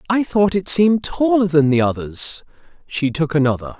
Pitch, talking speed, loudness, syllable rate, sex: 165 Hz, 175 wpm, -17 LUFS, 5.1 syllables/s, male